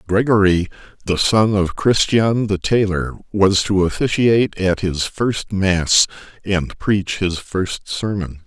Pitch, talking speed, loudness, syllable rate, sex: 100 Hz, 135 wpm, -18 LUFS, 3.7 syllables/s, male